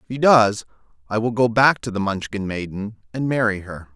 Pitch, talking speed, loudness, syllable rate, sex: 110 Hz, 210 wpm, -20 LUFS, 5.3 syllables/s, male